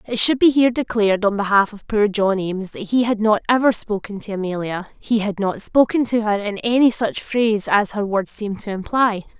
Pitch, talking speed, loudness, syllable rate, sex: 210 Hz, 215 wpm, -19 LUFS, 5.5 syllables/s, female